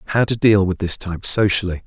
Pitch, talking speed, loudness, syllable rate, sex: 100 Hz, 225 wpm, -17 LUFS, 6.3 syllables/s, male